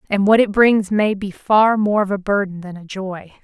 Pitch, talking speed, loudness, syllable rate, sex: 200 Hz, 245 wpm, -17 LUFS, 4.7 syllables/s, female